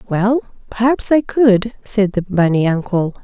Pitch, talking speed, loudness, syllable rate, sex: 210 Hz, 150 wpm, -16 LUFS, 4.2 syllables/s, female